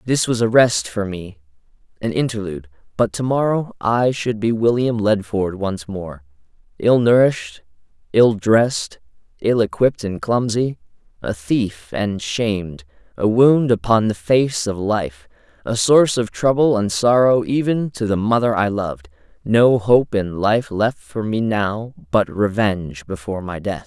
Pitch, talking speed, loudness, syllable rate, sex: 110 Hz, 155 wpm, -18 LUFS, 4.3 syllables/s, male